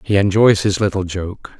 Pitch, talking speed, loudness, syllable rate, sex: 95 Hz, 190 wpm, -16 LUFS, 4.7 syllables/s, male